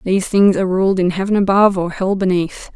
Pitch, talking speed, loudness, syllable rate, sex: 190 Hz, 220 wpm, -16 LUFS, 6.1 syllables/s, female